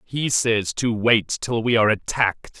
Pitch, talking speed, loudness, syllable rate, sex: 115 Hz, 185 wpm, -20 LUFS, 4.6 syllables/s, male